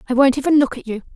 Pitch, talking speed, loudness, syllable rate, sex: 265 Hz, 315 wpm, -16 LUFS, 8.1 syllables/s, female